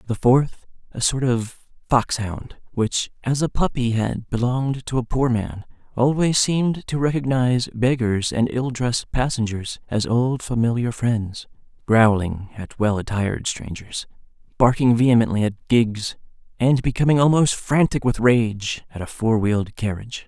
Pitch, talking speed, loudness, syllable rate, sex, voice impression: 120 Hz, 140 wpm, -21 LUFS, 4.6 syllables/s, male, very masculine, very adult-like, slightly middle-aged, thick, relaxed, slightly weak, slightly dark, soft, very muffled, fluent, slightly raspy, cool, very intellectual, slightly refreshing, sincere, calm, slightly mature, friendly, reassuring, slightly unique, elegant, slightly wild, slightly sweet, slightly lively, kind, very modest, slightly light